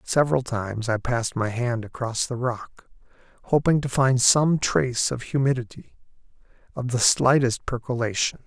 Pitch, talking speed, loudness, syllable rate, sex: 125 Hz, 135 wpm, -23 LUFS, 4.9 syllables/s, male